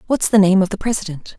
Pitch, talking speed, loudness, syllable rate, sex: 195 Hz, 260 wpm, -16 LUFS, 6.5 syllables/s, female